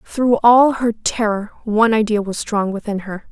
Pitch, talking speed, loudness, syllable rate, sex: 220 Hz, 180 wpm, -17 LUFS, 4.4 syllables/s, female